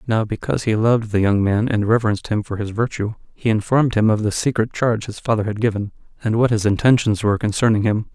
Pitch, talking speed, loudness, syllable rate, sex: 110 Hz, 230 wpm, -19 LUFS, 6.5 syllables/s, male